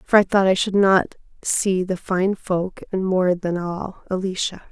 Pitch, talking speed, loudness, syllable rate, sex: 190 Hz, 190 wpm, -21 LUFS, 4.0 syllables/s, female